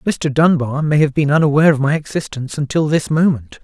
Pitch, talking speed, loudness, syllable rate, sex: 145 Hz, 200 wpm, -16 LUFS, 5.9 syllables/s, male